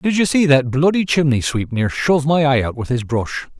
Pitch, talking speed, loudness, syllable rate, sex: 145 Hz, 235 wpm, -17 LUFS, 5.3 syllables/s, male